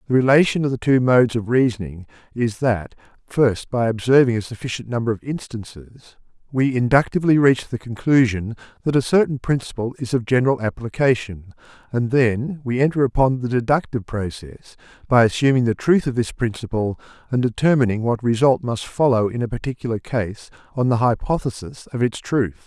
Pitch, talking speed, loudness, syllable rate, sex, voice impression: 120 Hz, 165 wpm, -20 LUFS, 5.6 syllables/s, male, very masculine, very adult-like, old, thick, slightly relaxed, slightly weak, very bright, soft, clear, very fluent, slightly raspy, very cool, intellectual, slightly refreshing, very sincere, very calm, very friendly, reassuring, very unique, elegant, slightly wild, slightly sweet, very lively, very kind, slightly intense, slightly light